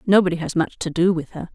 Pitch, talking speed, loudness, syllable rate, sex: 170 Hz, 270 wpm, -21 LUFS, 6.3 syllables/s, female